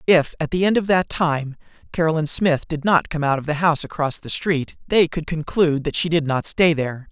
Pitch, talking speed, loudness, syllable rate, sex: 160 Hz, 235 wpm, -20 LUFS, 5.5 syllables/s, male